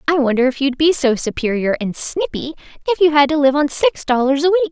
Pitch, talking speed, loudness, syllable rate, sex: 270 Hz, 240 wpm, -16 LUFS, 6.0 syllables/s, female